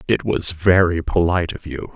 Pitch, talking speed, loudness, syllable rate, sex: 90 Hz, 185 wpm, -18 LUFS, 5.0 syllables/s, male